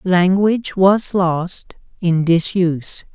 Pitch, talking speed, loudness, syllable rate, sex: 180 Hz, 95 wpm, -16 LUFS, 3.3 syllables/s, female